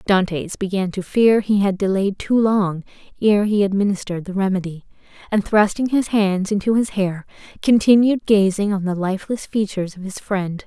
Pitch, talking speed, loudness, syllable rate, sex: 200 Hz, 170 wpm, -19 LUFS, 5.2 syllables/s, female